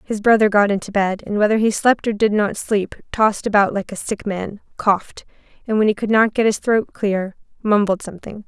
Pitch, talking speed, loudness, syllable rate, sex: 210 Hz, 220 wpm, -18 LUFS, 5.4 syllables/s, female